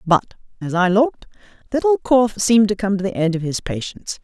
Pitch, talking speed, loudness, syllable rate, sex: 205 Hz, 210 wpm, -18 LUFS, 5.9 syllables/s, female